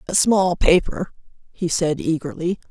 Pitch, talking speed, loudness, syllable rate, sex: 170 Hz, 135 wpm, -20 LUFS, 4.5 syllables/s, female